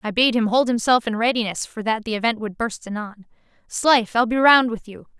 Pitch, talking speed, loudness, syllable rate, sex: 230 Hz, 230 wpm, -20 LUFS, 5.6 syllables/s, female